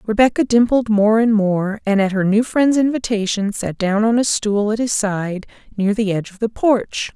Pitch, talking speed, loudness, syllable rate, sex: 215 Hz, 210 wpm, -17 LUFS, 4.8 syllables/s, female